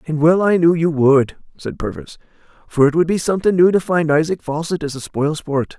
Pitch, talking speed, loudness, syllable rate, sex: 160 Hz, 230 wpm, -17 LUFS, 5.4 syllables/s, male